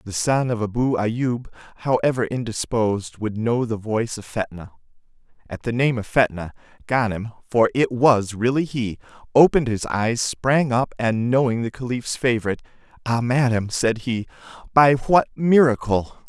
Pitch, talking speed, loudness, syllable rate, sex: 120 Hz, 150 wpm, -21 LUFS, 4.5 syllables/s, male